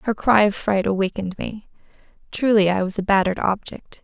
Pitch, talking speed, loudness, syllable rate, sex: 200 Hz, 180 wpm, -20 LUFS, 5.8 syllables/s, female